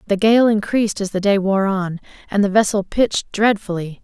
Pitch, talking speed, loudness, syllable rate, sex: 200 Hz, 195 wpm, -18 LUFS, 5.4 syllables/s, female